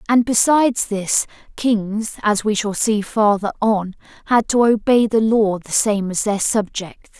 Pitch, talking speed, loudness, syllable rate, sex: 215 Hz, 165 wpm, -18 LUFS, 4.1 syllables/s, female